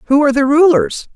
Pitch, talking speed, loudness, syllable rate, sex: 290 Hz, 210 wpm, -12 LUFS, 5.6 syllables/s, female